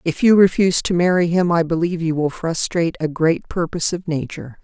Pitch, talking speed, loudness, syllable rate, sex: 170 Hz, 205 wpm, -18 LUFS, 6.0 syllables/s, female